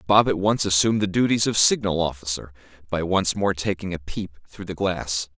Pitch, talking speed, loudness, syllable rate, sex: 95 Hz, 200 wpm, -22 LUFS, 5.4 syllables/s, male